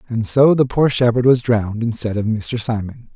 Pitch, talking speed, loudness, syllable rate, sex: 120 Hz, 210 wpm, -17 LUFS, 5.1 syllables/s, male